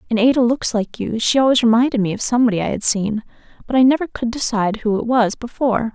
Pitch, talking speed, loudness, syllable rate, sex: 235 Hz, 220 wpm, -18 LUFS, 6.6 syllables/s, female